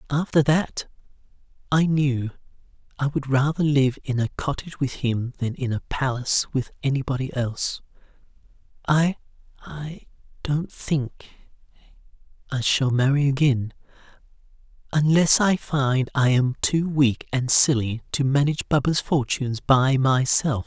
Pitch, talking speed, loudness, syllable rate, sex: 135 Hz, 115 wpm, -22 LUFS, 4.6 syllables/s, male